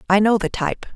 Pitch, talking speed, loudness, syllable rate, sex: 205 Hz, 250 wpm, -19 LUFS, 8.5 syllables/s, female